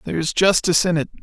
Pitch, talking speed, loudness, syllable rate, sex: 170 Hz, 245 wpm, -18 LUFS, 8.0 syllables/s, male